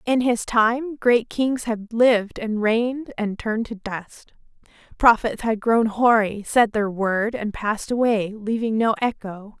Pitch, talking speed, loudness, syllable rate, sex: 225 Hz, 165 wpm, -21 LUFS, 4.0 syllables/s, female